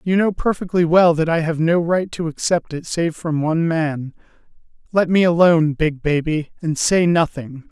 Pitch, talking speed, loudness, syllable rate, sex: 165 Hz, 185 wpm, -18 LUFS, 4.8 syllables/s, male